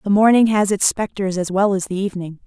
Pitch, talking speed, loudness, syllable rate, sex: 195 Hz, 245 wpm, -18 LUFS, 6.0 syllables/s, female